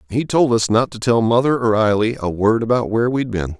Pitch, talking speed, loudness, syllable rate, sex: 115 Hz, 250 wpm, -17 LUFS, 5.7 syllables/s, male